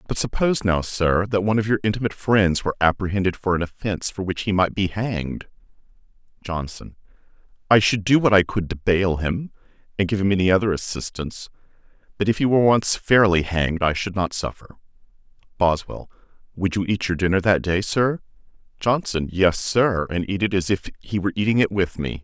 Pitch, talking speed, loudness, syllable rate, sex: 95 Hz, 190 wpm, -21 LUFS, 5.8 syllables/s, male